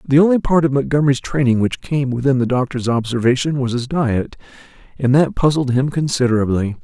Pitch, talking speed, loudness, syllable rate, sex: 130 Hz, 175 wpm, -17 LUFS, 5.7 syllables/s, male